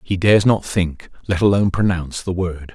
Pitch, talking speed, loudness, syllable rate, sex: 90 Hz, 195 wpm, -18 LUFS, 5.7 syllables/s, male